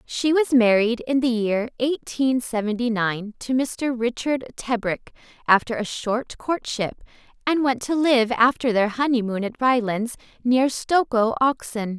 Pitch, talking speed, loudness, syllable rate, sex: 240 Hz, 145 wpm, -22 LUFS, 4.2 syllables/s, female